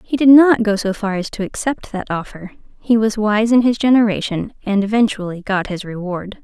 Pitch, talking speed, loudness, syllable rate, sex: 210 Hz, 205 wpm, -17 LUFS, 5.2 syllables/s, female